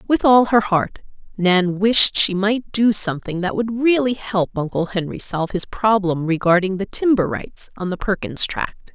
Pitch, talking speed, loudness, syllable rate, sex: 200 Hz, 180 wpm, -18 LUFS, 4.5 syllables/s, female